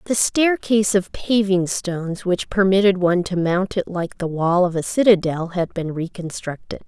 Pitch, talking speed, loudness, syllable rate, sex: 185 Hz, 175 wpm, -20 LUFS, 4.8 syllables/s, female